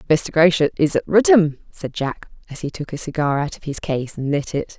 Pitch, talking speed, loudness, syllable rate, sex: 160 Hz, 240 wpm, -20 LUFS, 5.1 syllables/s, female